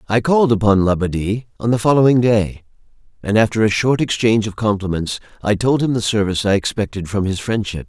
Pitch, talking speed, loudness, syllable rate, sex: 110 Hz, 190 wpm, -17 LUFS, 6.0 syllables/s, male